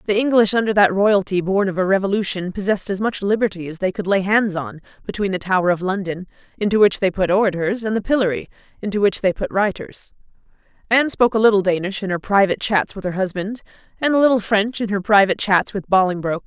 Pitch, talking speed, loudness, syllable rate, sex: 200 Hz, 215 wpm, -19 LUFS, 6.5 syllables/s, female